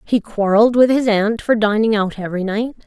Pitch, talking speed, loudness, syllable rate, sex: 220 Hz, 210 wpm, -16 LUFS, 5.7 syllables/s, female